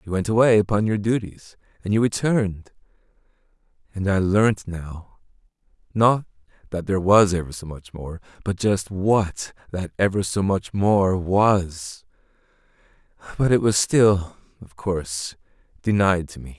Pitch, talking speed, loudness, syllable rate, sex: 95 Hz, 140 wpm, -21 LUFS, 4.3 syllables/s, male